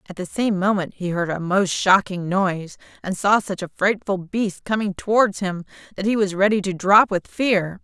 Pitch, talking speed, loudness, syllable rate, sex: 195 Hz, 205 wpm, -20 LUFS, 4.9 syllables/s, female